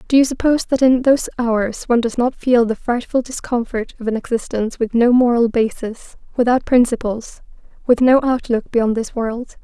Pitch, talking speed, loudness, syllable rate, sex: 240 Hz, 180 wpm, -17 LUFS, 5.2 syllables/s, female